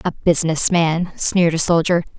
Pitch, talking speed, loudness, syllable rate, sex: 170 Hz, 165 wpm, -16 LUFS, 5.2 syllables/s, female